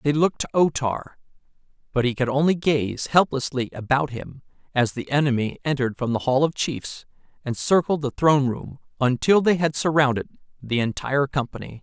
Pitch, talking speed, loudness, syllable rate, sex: 140 Hz, 175 wpm, -22 LUFS, 5.4 syllables/s, male